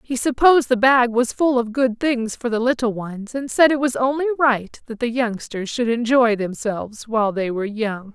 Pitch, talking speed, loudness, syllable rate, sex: 240 Hz, 215 wpm, -19 LUFS, 5.0 syllables/s, female